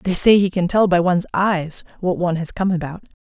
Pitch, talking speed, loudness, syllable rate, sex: 180 Hz, 240 wpm, -18 LUFS, 5.7 syllables/s, female